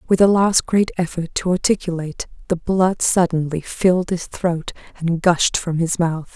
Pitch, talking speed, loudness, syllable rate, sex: 175 Hz, 170 wpm, -19 LUFS, 4.6 syllables/s, female